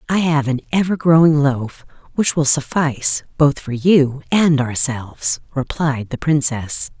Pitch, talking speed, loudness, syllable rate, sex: 145 Hz, 145 wpm, -17 LUFS, 4.2 syllables/s, female